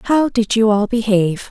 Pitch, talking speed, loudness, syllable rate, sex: 220 Hz, 200 wpm, -16 LUFS, 5.1 syllables/s, female